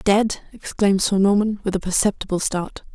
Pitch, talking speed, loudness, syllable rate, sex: 200 Hz, 165 wpm, -20 LUFS, 5.3 syllables/s, female